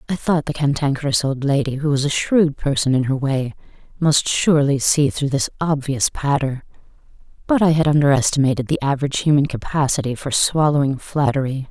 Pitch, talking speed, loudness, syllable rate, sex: 140 Hz, 170 wpm, -18 LUFS, 5.6 syllables/s, female